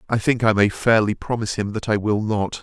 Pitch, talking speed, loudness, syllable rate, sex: 110 Hz, 250 wpm, -20 LUFS, 5.7 syllables/s, male